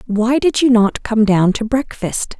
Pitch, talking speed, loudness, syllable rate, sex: 230 Hz, 200 wpm, -15 LUFS, 4.0 syllables/s, female